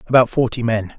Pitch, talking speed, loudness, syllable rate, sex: 115 Hz, 180 wpm, -18 LUFS, 5.9 syllables/s, male